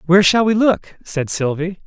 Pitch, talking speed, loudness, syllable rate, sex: 180 Hz, 195 wpm, -17 LUFS, 5.0 syllables/s, male